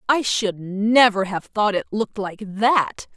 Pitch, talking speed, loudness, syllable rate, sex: 210 Hz, 170 wpm, -20 LUFS, 3.8 syllables/s, female